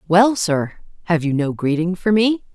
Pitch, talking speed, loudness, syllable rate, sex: 180 Hz, 165 wpm, -18 LUFS, 4.5 syllables/s, female